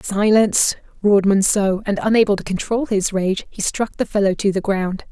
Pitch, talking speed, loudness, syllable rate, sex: 200 Hz, 190 wpm, -18 LUFS, 5.2 syllables/s, female